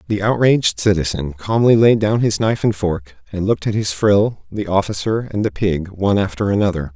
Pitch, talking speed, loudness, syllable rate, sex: 100 Hz, 200 wpm, -17 LUFS, 5.5 syllables/s, male